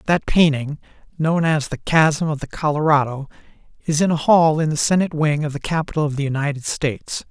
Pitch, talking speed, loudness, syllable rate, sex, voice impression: 150 Hz, 195 wpm, -19 LUFS, 5.6 syllables/s, male, masculine, very adult-like, slightly soft, slightly muffled, sincere, slightly elegant, kind